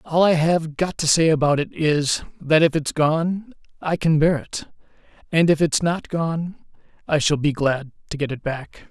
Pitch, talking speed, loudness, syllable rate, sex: 155 Hz, 200 wpm, -20 LUFS, 4.3 syllables/s, male